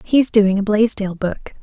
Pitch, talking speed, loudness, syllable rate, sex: 210 Hz, 185 wpm, -17 LUFS, 4.7 syllables/s, female